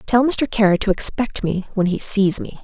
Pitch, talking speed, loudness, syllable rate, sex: 210 Hz, 230 wpm, -18 LUFS, 5.0 syllables/s, female